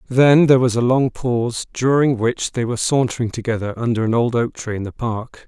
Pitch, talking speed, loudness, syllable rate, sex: 120 Hz, 220 wpm, -18 LUFS, 5.6 syllables/s, male